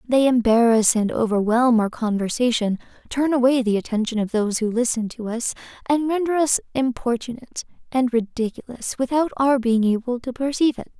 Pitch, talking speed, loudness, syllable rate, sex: 240 Hz, 160 wpm, -21 LUFS, 5.5 syllables/s, female